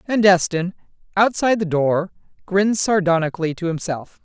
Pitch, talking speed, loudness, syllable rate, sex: 185 Hz, 125 wpm, -19 LUFS, 5.4 syllables/s, female